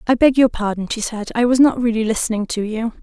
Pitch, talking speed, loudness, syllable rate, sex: 230 Hz, 260 wpm, -18 LUFS, 6.1 syllables/s, female